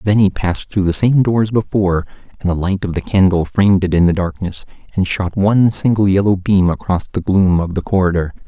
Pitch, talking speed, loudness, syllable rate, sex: 95 Hz, 225 wpm, -15 LUFS, 5.8 syllables/s, male